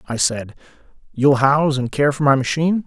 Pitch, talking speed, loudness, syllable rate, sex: 140 Hz, 190 wpm, -17 LUFS, 5.7 syllables/s, male